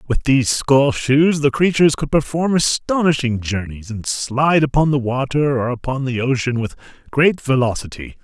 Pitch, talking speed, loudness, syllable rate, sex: 135 Hz, 160 wpm, -17 LUFS, 5.0 syllables/s, male